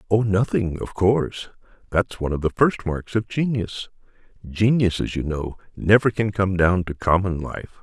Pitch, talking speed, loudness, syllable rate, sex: 95 Hz, 170 wpm, -22 LUFS, 4.7 syllables/s, male